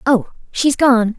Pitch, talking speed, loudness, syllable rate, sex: 245 Hz, 150 wpm, -15 LUFS, 3.5 syllables/s, female